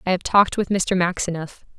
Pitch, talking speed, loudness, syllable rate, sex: 185 Hz, 200 wpm, -20 LUFS, 5.8 syllables/s, female